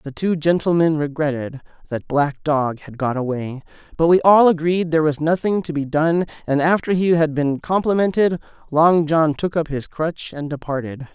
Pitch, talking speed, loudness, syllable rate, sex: 155 Hz, 185 wpm, -19 LUFS, 4.9 syllables/s, male